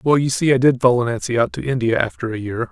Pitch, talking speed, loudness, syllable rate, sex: 125 Hz, 290 wpm, -18 LUFS, 6.5 syllables/s, male